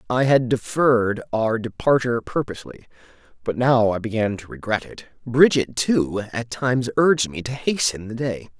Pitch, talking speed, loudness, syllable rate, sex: 120 Hz, 160 wpm, -21 LUFS, 5.1 syllables/s, male